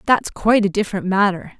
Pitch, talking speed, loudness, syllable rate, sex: 195 Hz, 190 wpm, -18 LUFS, 6.3 syllables/s, female